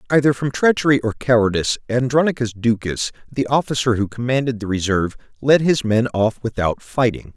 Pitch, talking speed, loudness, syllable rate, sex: 120 Hz, 155 wpm, -19 LUFS, 5.7 syllables/s, male